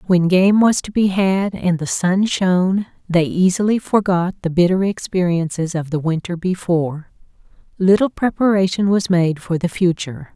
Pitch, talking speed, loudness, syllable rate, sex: 180 Hz, 155 wpm, -17 LUFS, 4.8 syllables/s, female